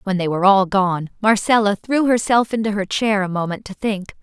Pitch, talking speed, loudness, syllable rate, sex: 205 Hz, 215 wpm, -18 LUFS, 5.5 syllables/s, female